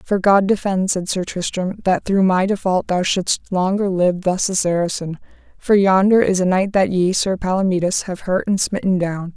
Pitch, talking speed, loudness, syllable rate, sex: 185 Hz, 200 wpm, -18 LUFS, 4.8 syllables/s, female